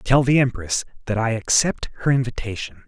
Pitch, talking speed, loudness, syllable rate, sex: 120 Hz, 165 wpm, -21 LUFS, 5.3 syllables/s, male